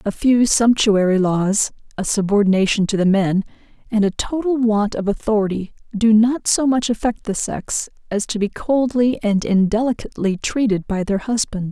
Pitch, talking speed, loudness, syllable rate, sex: 215 Hz, 165 wpm, -18 LUFS, 4.9 syllables/s, female